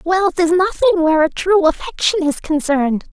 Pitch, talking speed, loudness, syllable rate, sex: 340 Hz, 170 wpm, -16 LUFS, 5.9 syllables/s, female